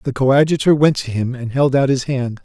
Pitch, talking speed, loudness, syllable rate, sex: 135 Hz, 245 wpm, -16 LUFS, 5.6 syllables/s, male